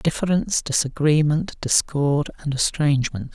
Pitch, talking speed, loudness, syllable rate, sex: 150 Hz, 90 wpm, -21 LUFS, 4.7 syllables/s, male